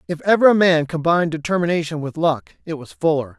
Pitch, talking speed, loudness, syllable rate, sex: 165 Hz, 195 wpm, -18 LUFS, 6.0 syllables/s, male